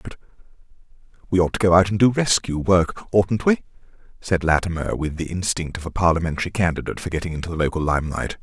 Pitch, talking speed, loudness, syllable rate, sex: 90 Hz, 190 wpm, -21 LUFS, 6.5 syllables/s, male